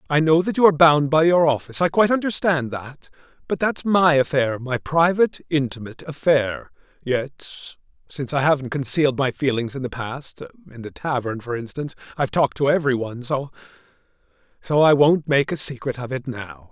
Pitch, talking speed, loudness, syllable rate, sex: 140 Hz, 185 wpm, -20 LUFS, 5.8 syllables/s, male